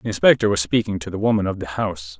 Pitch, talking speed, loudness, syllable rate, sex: 95 Hz, 275 wpm, -20 LUFS, 7.0 syllables/s, male